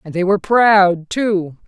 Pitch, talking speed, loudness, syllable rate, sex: 190 Hz, 180 wpm, -15 LUFS, 4.0 syllables/s, female